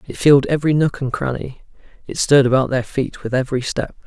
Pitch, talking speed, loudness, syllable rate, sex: 135 Hz, 205 wpm, -18 LUFS, 6.4 syllables/s, male